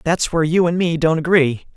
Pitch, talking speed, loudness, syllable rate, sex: 165 Hz, 240 wpm, -17 LUFS, 5.7 syllables/s, male